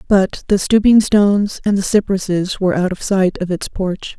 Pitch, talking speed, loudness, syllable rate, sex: 195 Hz, 200 wpm, -16 LUFS, 4.9 syllables/s, female